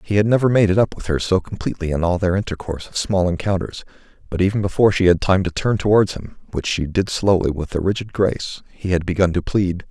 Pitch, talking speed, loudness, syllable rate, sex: 95 Hz, 240 wpm, -19 LUFS, 6.3 syllables/s, male